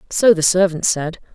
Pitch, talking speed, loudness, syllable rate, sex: 175 Hz, 180 wpm, -16 LUFS, 4.9 syllables/s, female